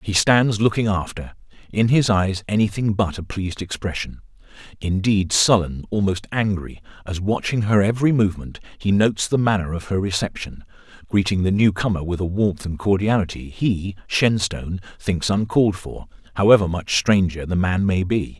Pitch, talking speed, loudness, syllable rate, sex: 100 Hz, 155 wpm, -20 LUFS, 5.2 syllables/s, male